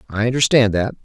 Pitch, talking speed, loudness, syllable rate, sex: 115 Hz, 175 wpm, -16 LUFS, 6.3 syllables/s, male